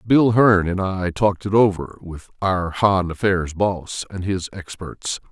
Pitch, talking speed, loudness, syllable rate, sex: 95 Hz, 170 wpm, -20 LUFS, 3.9 syllables/s, male